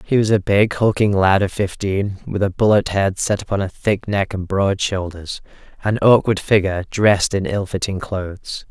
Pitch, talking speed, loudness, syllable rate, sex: 100 Hz, 185 wpm, -18 LUFS, 4.9 syllables/s, male